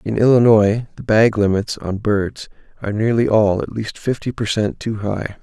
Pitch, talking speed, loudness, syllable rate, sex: 110 Hz, 190 wpm, -18 LUFS, 4.7 syllables/s, male